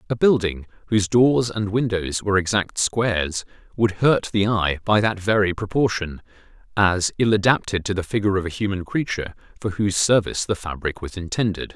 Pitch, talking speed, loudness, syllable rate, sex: 100 Hz, 175 wpm, -21 LUFS, 5.6 syllables/s, male